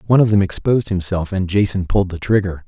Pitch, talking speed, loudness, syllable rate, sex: 95 Hz, 225 wpm, -18 LUFS, 6.8 syllables/s, male